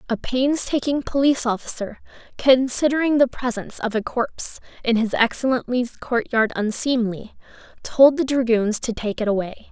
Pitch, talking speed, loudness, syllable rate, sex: 245 Hz, 135 wpm, -21 LUFS, 5.0 syllables/s, female